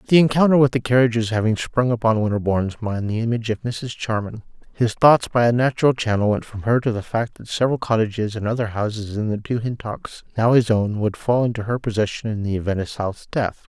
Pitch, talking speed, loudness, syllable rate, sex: 115 Hz, 225 wpm, -21 LUFS, 5.9 syllables/s, male